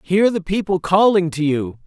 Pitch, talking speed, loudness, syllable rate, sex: 175 Hz, 195 wpm, -18 LUFS, 4.7 syllables/s, male